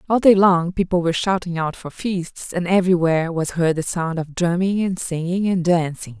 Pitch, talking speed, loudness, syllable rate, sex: 175 Hz, 205 wpm, -20 LUFS, 5.2 syllables/s, female